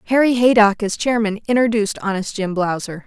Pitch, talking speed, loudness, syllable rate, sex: 215 Hz, 155 wpm, -18 LUFS, 5.8 syllables/s, female